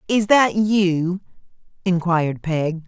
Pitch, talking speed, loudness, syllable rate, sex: 185 Hz, 105 wpm, -19 LUFS, 3.4 syllables/s, female